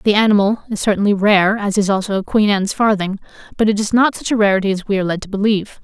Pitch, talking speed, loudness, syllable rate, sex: 205 Hz, 255 wpm, -16 LUFS, 6.9 syllables/s, female